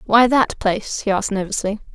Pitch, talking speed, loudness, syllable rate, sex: 215 Hz, 185 wpm, -19 LUFS, 6.0 syllables/s, female